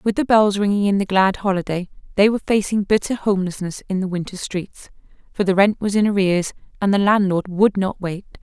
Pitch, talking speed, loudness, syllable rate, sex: 195 Hz, 205 wpm, -19 LUFS, 5.6 syllables/s, female